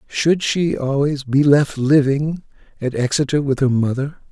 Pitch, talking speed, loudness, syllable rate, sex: 140 Hz, 155 wpm, -18 LUFS, 4.3 syllables/s, male